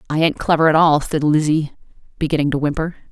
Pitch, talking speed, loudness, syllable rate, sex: 155 Hz, 195 wpm, -17 LUFS, 6.4 syllables/s, female